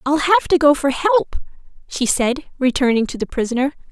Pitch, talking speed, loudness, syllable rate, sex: 275 Hz, 185 wpm, -17 LUFS, 5.4 syllables/s, female